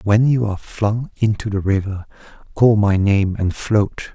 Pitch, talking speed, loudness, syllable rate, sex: 105 Hz, 175 wpm, -18 LUFS, 4.3 syllables/s, male